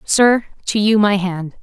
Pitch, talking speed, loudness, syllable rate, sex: 205 Hz, 185 wpm, -16 LUFS, 3.8 syllables/s, female